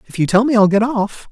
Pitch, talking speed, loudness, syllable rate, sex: 220 Hz, 320 wpm, -15 LUFS, 6.0 syllables/s, male